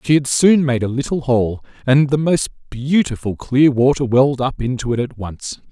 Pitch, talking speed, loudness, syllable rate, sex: 130 Hz, 200 wpm, -17 LUFS, 4.9 syllables/s, male